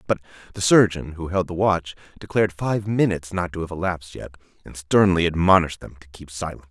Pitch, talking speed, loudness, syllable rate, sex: 85 Hz, 195 wpm, -21 LUFS, 6.3 syllables/s, male